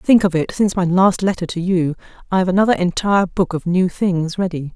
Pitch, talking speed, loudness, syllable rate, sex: 180 Hz, 225 wpm, -17 LUFS, 5.7 syllables/s, female